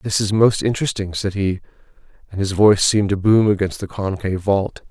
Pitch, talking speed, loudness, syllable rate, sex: 100 Hz, 195 wpm, -18 LUFS, 5.8 syllables/s, male